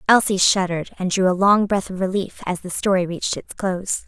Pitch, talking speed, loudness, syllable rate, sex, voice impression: 190 Hz, 220 wpm, -20 LUFS, 5.7 syllables/s, female, feminine, young, tensed, powerful, bright, clear, fluent, cute, friendly, lively, slightly kind